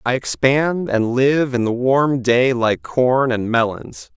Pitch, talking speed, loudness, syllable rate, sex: 125 Hz, 170 wpm, -17 LUFS, 3.5 syllables/s, male